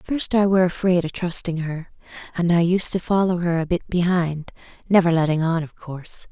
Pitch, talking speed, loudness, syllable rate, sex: 175 Hz, 210 wpm, -20 LUFS, 5.5 syllables/s, female